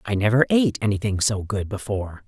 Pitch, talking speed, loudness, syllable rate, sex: 105 Hz, 185 wpm, -22 LUFS, 6.3 syllables/s, female